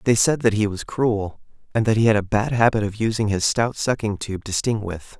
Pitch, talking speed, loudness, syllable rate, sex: 110 Hz, 255 wpm, -21 LUFS, 5.3 syllables/s, male